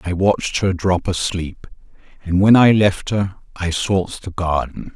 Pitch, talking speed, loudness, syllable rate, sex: 90 Hz, 170 wpm, -18 LUFS, 4.1 syllables/s, male